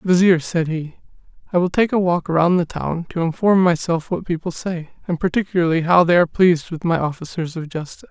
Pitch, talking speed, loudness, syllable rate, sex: 170 Hz, 205 wpm, -19 LUFS, 5.8 syllables/s, male